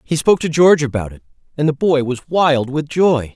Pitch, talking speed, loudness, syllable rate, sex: 150 Hz, 250 wpm, -16 LUFS, 5.5 syllables/s, male